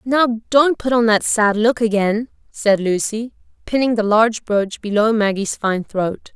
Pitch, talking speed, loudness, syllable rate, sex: 220 Hz, 170 wpm, -17 LUFS, 4.2 syllables/s, female